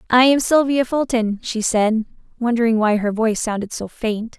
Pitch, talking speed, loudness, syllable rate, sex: 230 Hz, 180 wpm, -19 LUFS, 5.0 syllables/s, female